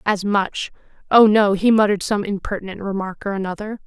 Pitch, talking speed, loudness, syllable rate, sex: 200 Hz, 155 wpm, -19 LUFS, 5.7 syllables/s, female